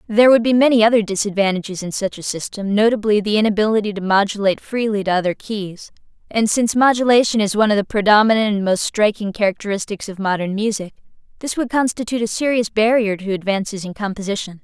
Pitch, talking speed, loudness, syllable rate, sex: 210 Hz, 180 wpm, -18 LUFS, 6.5 syllables/s, female